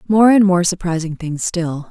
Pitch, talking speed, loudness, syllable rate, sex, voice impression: 180 Hz, 190 wpm, -16 LUFS, 4.6 syllables/s, female, feminine, slightly adult-like, fluent, calm, friendly, slightly sweet, kind